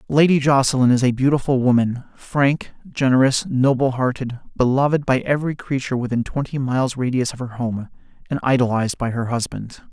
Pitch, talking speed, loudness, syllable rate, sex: 130 Hz, 155 wpm, -19 LUFS, 5.6 syllables/s, male